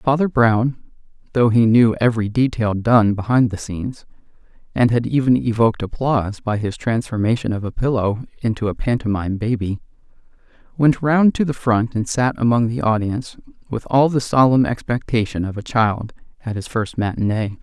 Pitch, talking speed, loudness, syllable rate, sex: 115 Hz, 165 wpm, -19 LUFS, 5.3 syllables/s, male